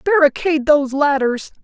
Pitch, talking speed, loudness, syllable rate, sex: 290 Hz, 110 wpm, -16 LUFS, 5.3 syllables/s, female